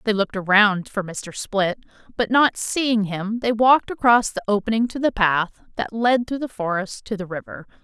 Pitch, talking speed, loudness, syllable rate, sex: 210 Hz, 200 wpm, -21 LUFS, 4.9 syllables/s, female